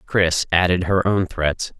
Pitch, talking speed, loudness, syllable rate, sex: 90 Hz, 165 wpm, -19 LUFS, 3.8 syllables/s, male